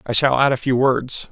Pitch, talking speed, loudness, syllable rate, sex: 130 Hz, 275 wpm, -18 LUFS, 5.0 syllables/s, male